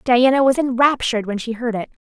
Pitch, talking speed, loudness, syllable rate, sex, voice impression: 245 Hz, 200 wpm, -18 LUFS, 6.0 syllables/s, female, very feminine, slightly young, very thin, tensed, powerful, very bright, hard, very clear, fluent, raspy, cute, slightly intellectual, very refreshing, slightly sincere, calm, friendly, slightly reassuring, very unique, slightly elegant, very wild, very lively, strict, intense, sharp, light